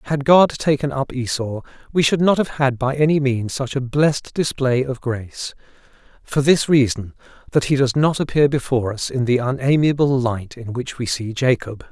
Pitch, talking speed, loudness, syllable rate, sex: 130 Hz, 190 wpm, -19 LUFS, 5.1 syllables/s, male